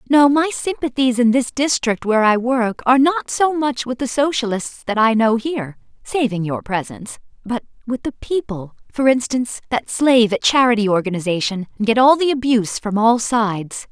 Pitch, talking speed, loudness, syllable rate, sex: 240 Hz, 170 wpm, -18 LUFS, 5.2 syllables/s, female